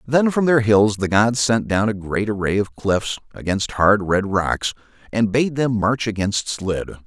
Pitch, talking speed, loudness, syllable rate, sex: 110 Hz, 195 wpm, -19 LUFS, 4.2 syllables/s, male